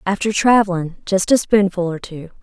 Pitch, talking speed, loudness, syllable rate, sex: 190 Hz, 150 wpm, -17 LUFS, 5.0 syllables/s, female